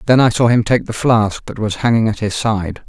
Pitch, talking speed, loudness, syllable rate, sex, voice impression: 110 Hz, 270 wpm, -16 LUFS, 5.2 syllables/s, male, masculine, adult-like, fluent, slightly refreshing, friendly, slightly kind